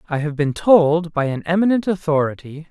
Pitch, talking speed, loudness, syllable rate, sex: 165 Hz, 175 wpm, -18 LUFS, 5.2 syllables/s, male